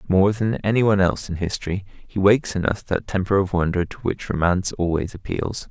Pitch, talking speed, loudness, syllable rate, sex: 95 Hz, 210 wpm, -22 LUFS, 5.9 syllables/s, male